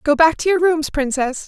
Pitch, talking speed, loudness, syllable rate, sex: 305 Hz, 245 wpm, -17 LUFS, 5.1 syllables/s, female